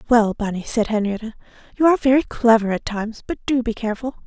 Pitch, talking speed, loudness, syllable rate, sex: 230 Hz, 195 wpm, -20 LUFS, 6.8 syllables/s, female